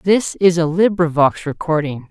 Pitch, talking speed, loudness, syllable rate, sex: 165 Hz, 145 wpm, -16 LUFS, 4.4 syllables/s, male